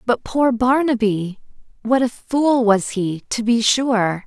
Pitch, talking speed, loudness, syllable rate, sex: 235 Hz, 155 wpm, -18 LUFS, 3.5 syllables/s, female